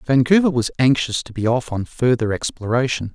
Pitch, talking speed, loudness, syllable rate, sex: 125 Hz, 170 wpm, -19 LUFS, 5.4 syllables/s, male